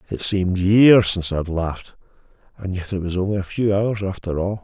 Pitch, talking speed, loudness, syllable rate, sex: 95 Hz, 205 wpm, -20 LUFS, 5.8 syllables/s, male